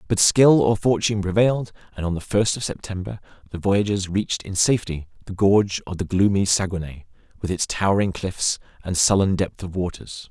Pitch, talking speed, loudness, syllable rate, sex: 95 Hz, 180 wpm, -21 LUFS, 5.6 syllables/s, male